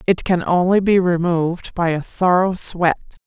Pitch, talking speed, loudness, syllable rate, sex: 175 Hz, 165 wpm, -18 LUFS, 4.6 syllables/s, female